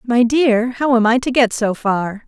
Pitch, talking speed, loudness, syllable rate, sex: 235 Hz, 235 wpm, -16 LUFS, 4.2 syllables/s, female